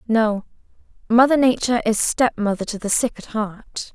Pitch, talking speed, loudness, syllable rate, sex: 225 Hz, 150 wpm, -19 LUFS, 4.8 syllables/s, female